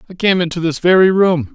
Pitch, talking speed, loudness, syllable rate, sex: 175 Hz, 235 wpm, -14 LUFS, 5.8 syllables/s, male